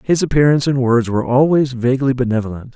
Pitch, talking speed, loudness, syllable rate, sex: 130 Hz, 175 wpm, -15 LUFS, 6.8 syllables/s, male